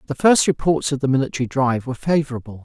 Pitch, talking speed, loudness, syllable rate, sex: 135 Hz, 205 wpm, -19 LUFS, 7.4 syllables/s, male